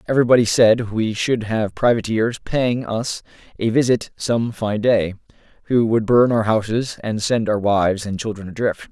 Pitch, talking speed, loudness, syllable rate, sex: 110 Hz, 170 wpm, -19 LUFS, 4.7 syllables/s, male